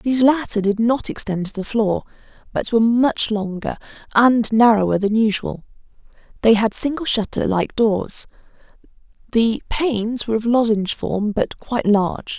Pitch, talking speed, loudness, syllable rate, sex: 225 Hz, 140 wpm, -19 LUFS, 4.9 syllables/s, female